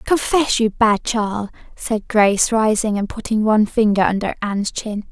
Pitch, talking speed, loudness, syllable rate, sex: 215 Hz, 165 wpm, -18 LUFS, 4.7 syllables/s, female